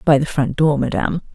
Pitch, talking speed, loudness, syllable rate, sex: 145 Hz, 225 wpm, -18 LUFS, 6.1 syllables/s, female